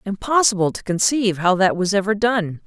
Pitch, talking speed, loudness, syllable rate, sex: 200 Hz, 180 wpm, -18 LUFS, 5.6 syllables/s, female